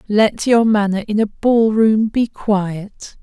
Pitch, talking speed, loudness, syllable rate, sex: 215 Hz, 170 wpm, -16 LUFS, 3.3 syllables/s, female